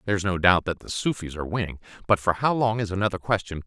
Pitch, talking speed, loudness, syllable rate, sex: 100 Hz, 245 wpm, -24 LUFS, 6.9 syllables/s, male